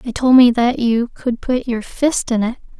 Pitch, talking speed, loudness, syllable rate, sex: 240 Hz, 235 wpm, -16 LUFS, 4.4 syllables/s, female